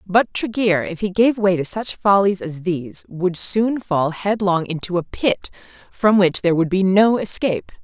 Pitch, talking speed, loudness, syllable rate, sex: 190 Hz, 190 wpm, -19 LUFS, 4.7 syllables/s, female